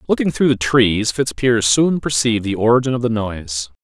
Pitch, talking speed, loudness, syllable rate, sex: 115 Hz, 190 wpm, -17 LUFS, 5.3 syllables/s, male